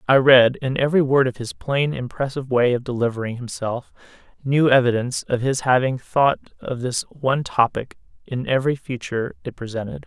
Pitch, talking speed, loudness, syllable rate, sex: 130 Hz, 165 wpm, -21 LUFS, 5.6 syllables/s, male